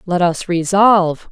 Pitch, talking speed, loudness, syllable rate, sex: 180 Hz, 135 wpm, -14 LUFS, 4.2 syllables/s, female